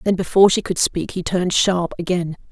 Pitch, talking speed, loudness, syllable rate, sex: 180 Hz, 215 wpm, -18 LUFS, 5.8 syllables/s, female